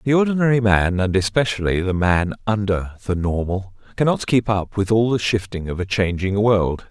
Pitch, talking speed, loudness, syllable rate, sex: 100 Hz, 180 wpm, -20 LUFS, 5.1 syllables/s, male